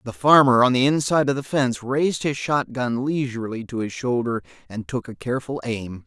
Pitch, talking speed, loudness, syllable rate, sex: 125 Hz, 200 wpm, -22 LUFS, 5.7 syllables/s, male